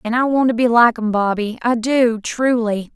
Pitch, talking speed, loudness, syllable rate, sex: 235 Hz, 225 wpm, -17 LUFS, 4.7 syllables/s, female